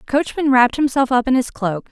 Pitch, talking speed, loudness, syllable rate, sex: 255 Hz, 250 wpm, -17 LUFS, 6.3 syllables/s, female